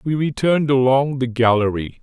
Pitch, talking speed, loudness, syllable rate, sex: 130 Hz, 150 wpm, -18 LUFS, 5.2 syllables/s, male